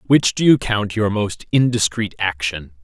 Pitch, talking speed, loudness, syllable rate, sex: 105 Hz, 170 wpm, -18 LUFS, 4.4 syllables/s, male